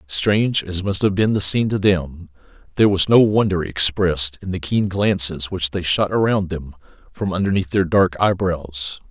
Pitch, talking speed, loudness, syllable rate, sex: 90 Hz, 185 wpm, -18 LUFS, 4.9 syllables/s, male